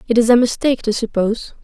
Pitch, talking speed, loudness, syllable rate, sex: 230 Hz, 220 wpm, -16 LUFS, 7.2 syllables/s, female